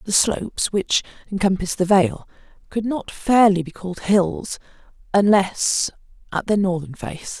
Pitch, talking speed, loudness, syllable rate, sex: 190 Hz, 140 wpm, -20 LUFS, 4.5 syllables/s, female